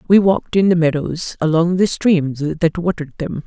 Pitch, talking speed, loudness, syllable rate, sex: 170 Hz, 190 wpm, -17 LUFS, 4.9 syllables/s, female